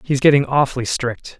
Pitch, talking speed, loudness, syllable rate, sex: 135 Hz, 170 wpm, -17 LUFS, 5.4 syllables/s, male